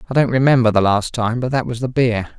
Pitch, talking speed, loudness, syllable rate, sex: 120 Hz, 250 wpm, -17 LUFS, 6.2 syllables/s, male